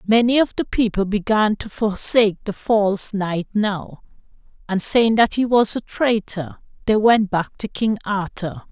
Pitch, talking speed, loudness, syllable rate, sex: 210 Hz, 165 wpm, -19 LUFS, 4.3 syllables/s, female